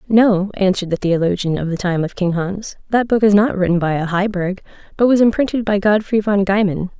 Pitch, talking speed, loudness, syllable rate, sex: 195 Hz, 215 wpm, -17 LUFS, 5.6 syllables/s, female